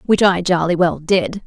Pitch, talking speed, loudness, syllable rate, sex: 180 Hz, 205 wpm, -16 LUFS, 4.6 syllables/s, female